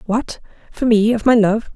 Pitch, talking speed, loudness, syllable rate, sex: 225 Hz, 205 wpm, -16 LUFS, 4.6 syllables/s, female